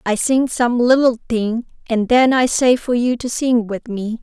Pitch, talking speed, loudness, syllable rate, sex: 240 Hz, 215 wpm, -17 LUFS, 3.9 syllables/s, female